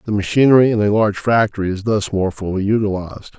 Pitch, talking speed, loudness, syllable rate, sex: 105 Hz, 195 wpm, -16 LUFS, 6.5 syllables/s, male